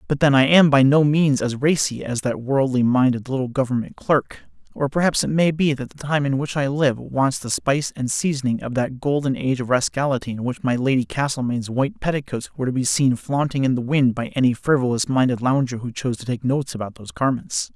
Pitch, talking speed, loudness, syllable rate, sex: 135 Hz, 225 wpm, -21 LUFS, 5.8 syllables/s, male